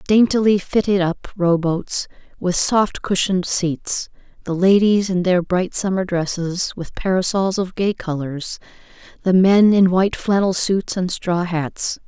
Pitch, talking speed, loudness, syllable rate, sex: 185 Hz, 145 wpm, -19 LUFS, 4.1 syllables/s, female